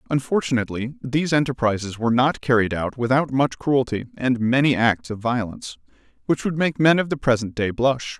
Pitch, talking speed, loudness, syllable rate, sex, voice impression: 130 Hz, 175 wpm, -21 LUFS, 5.6 syllables/s, male, very masculine, adult-like, slightly thick, slightly fluent, cool, slightly intellectual, slightly refreshing, slightly friendly